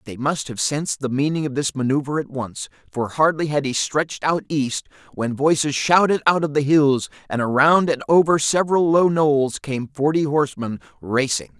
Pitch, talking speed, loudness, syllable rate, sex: 145 Hz, 185 wpm, -20 LUFS, 5.1 syllables/s, male